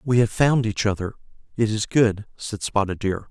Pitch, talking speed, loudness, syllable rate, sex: 110 Hz, 180 wpm, -22 LUFS, 4.9 syllables/s, male